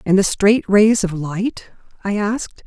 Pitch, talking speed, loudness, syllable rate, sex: 200 Hz, 180 wpm, -17 LUFS, 4.1 syllables/s, female